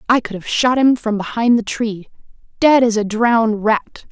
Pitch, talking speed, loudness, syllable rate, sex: 225 Hz, 190 wpm, -16 LUFS, 4.8 syllables/s, female